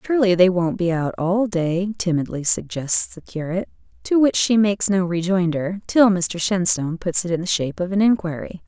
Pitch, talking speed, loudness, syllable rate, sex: 185 Hz, 195 wpm, -20 LUFS, 5.4 syllables/s, female